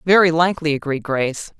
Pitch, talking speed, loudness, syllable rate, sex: 160 Hz, 150 wpm, -18 LUFS, 6.2 syllables/s, female